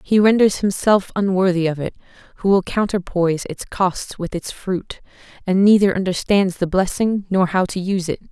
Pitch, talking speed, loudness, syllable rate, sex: 190 Hz, 175 wpm, -19 LUFS, 5.1 syllables/s, female